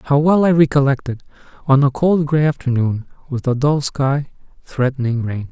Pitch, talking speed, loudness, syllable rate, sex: 140 Hz, 175 wpm, -17 LUFS, 5.1 syllables/s, male